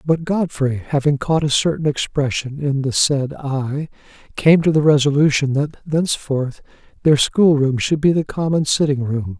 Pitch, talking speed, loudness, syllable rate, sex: 145 Hz, 160 wpm, -18 LUFS, 4.6 syllables/s, male